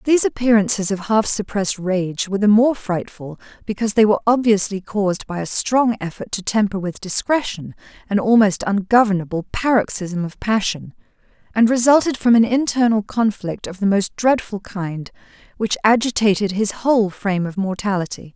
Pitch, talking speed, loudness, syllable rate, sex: 210 Hz, 155 wpm, -18 LUFS, 5.3 syllables/s, female